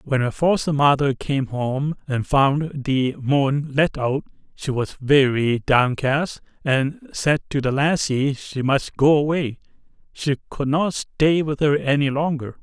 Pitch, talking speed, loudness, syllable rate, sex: 140 Hz, 155 wpm, -21 LUFS, 3.8 syllables/s, male